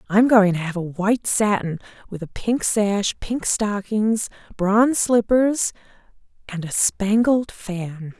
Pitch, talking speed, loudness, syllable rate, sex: 205 Hz, 140 wpm, -20 LUFS, 3.8 syllables/s, female